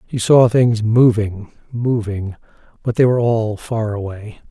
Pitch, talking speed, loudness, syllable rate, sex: 110 Hz, 145 wpm, -16 LUFS, 4.1 syllables/s, male